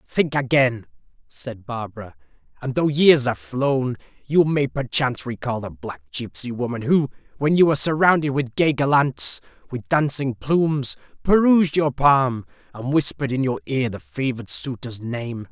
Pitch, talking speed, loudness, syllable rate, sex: 130 Hz, 155 wpm, -21 LUFS, 4.7 syllables/s, male